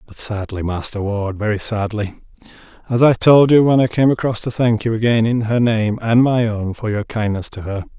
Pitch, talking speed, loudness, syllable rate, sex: 110 Hz, 220 wpm, -17 LUFS, 5.1 syllables/s, male